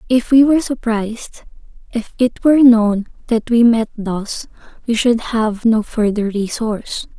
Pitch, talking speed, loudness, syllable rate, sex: 225 Hz, 150 wpm, -16 LUFS, 4.4 syllables/s, female